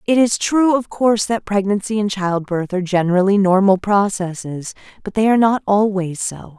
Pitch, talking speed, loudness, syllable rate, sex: 200 Hz, 175 wpm, -17 LUFS, 5.2 syllables/s, female